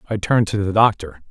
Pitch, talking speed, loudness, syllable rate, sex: 100 Hz, 230 wpm, -18 LUFS, 6.7 syllables/s, male